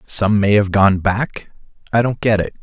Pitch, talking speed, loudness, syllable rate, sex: 105 Hz, 205 wpm, -16 LUFS, 4.3 syllables/s, male